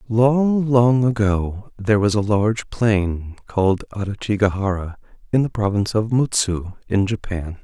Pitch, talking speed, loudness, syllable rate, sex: 105 Hz, 135 wpm, -20 LUFS, 4.4 syllables/s, male